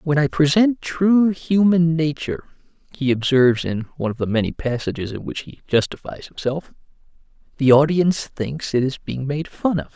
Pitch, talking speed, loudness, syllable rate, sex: 150 Hz, 170 wpm, -20 LUFS, 5.2 syllables/s, male